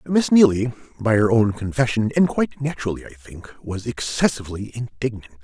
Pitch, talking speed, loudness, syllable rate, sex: 120 Hz, 155 wpm, -21 LUFS, 4.4 syllables/s, male